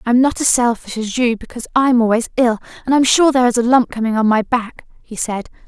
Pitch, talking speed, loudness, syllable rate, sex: 240 Hz, 245 wpm, -16 LUFS, 6.0 syllables/s, female